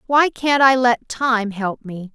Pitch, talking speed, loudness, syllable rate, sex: 240 Hz, 195 wpm, -17 LUFS, 3.5 syllables/s, female